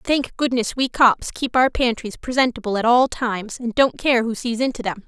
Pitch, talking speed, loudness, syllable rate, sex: 240 Hz, 215 wpm, -20 LUFS, 5.1 syllables/s, female